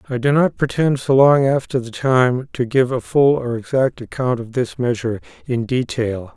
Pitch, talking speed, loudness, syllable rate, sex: 125 Hz, 200 wpm, -18 LUFS, 4.8 syllables/s, male